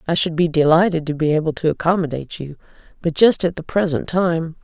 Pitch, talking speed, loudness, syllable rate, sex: 165 Hz, 205 wpm, -18 LUFS, 6.3 syllables/s, female